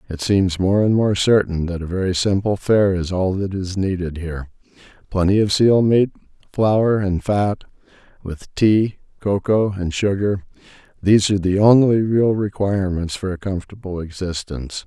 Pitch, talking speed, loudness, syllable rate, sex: 95 Hz, 150 wpm, -19 LUFS, 4.8 syllables/s, male